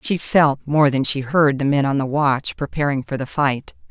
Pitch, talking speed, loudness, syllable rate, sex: 140 Hz, 230 wpm, -19 LUFS, 4.7 syllables/s, female